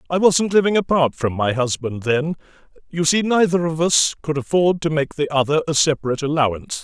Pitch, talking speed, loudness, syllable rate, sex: 155 Hz, 195 wpm, -19 LUFS, 5.8 syllables/s, male